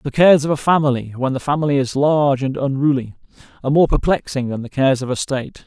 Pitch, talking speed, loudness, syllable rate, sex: 140 Hz, 220 wpm, -18 LUFS, 6.6 syllables/s, male